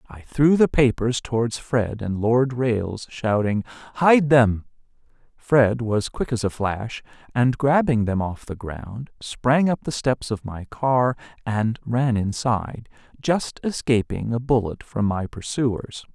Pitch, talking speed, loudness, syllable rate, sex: 120 Hz, 150 wpm, -22 LUFS, 3.8 syllables/s, male